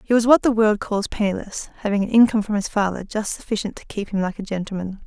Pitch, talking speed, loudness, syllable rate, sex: 205 Hz, 250 wpm, -21 LUFS, 6.5 syllables/s, female